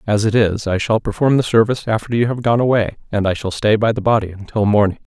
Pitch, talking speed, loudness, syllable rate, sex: 110 Hz, 260 wpm, -17 LUFS, 6.3 syllables/s, male